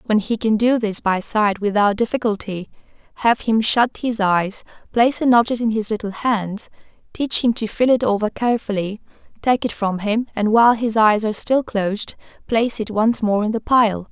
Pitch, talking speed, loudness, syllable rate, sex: 220 Hz, 195 wpm, -19 LUFS, 5.1 syllables/s, female